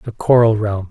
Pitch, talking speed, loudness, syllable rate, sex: 110 Hz, 200 wpm, -15 LUFS, 5.1 syllables/s, male